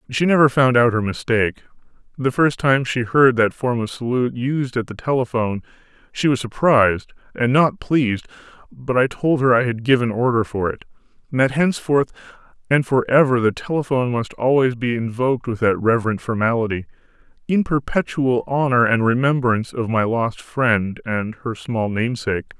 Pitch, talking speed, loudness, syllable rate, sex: 125 Hz, 165 wpm, -19 LUFS, 5.3 syllables/s, male